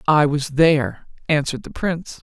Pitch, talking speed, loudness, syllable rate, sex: 150 Hz, 155 wpm, -20 LUFS, 5.4 syllables/s, female